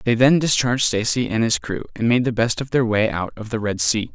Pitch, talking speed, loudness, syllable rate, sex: 115 Hz, 275 wpm, -19 LUFS, 5.7 syllables/s, male